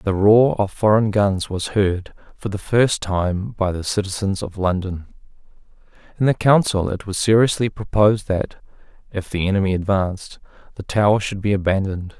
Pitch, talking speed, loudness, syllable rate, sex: 100 Hz, 160 wpm, -19 LUFS, 5.0 syllables/s, male